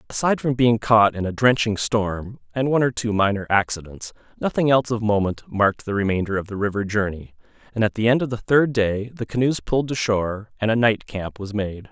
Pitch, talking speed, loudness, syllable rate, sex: 110 Hz, 220 wpm, -21 LUFS, 5.8 syllables/s, male